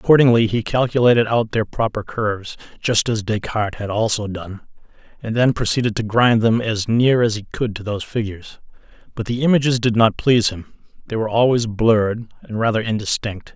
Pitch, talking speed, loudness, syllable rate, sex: 110 Hz, 180 wpm, -19 LUFS, 5.7 syllables/s, male